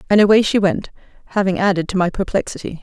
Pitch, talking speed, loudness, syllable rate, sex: 190 Hz, 190 wpm, -17 LUFS, 6.7 syllables/s, female